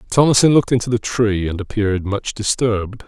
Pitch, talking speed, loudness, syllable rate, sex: 110 Hz, 175 wpm, -17 LUFS, 5.9 syllables/s, male